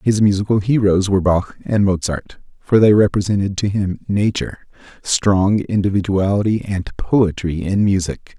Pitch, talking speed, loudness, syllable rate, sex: 100 Hz, 135 wpm, -17 LUFS, 4.8 syllables/s, male